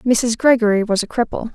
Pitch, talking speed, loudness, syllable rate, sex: 225 Hz, 195 wpm, -17 LUFS, 5.3 syllables/s, female